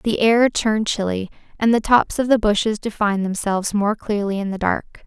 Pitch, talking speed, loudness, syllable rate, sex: 210 Hz, 200 wpm, -19 LUFS, 5.3 syllables/s, female